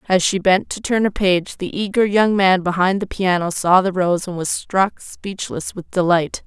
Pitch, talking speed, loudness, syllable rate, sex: 190 Hz, 215 wpm, -18 LUFS, 4.5 syllables/s, female